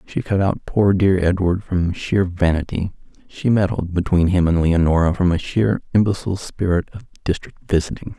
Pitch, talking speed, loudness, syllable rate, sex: 90 Hz, 170 wpm, -19 LUFS, 5.0 syllables/s, male